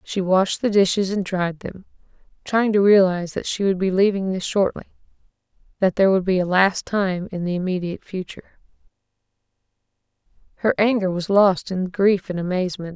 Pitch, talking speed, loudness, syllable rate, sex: 190 Hz, 160 wpm, -20 LUFS, 5.5 syllables/s, female